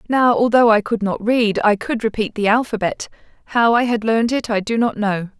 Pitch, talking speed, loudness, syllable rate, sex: 220 Hz, 225 wpm, -17 LUFS, 5.3 syllables/s, female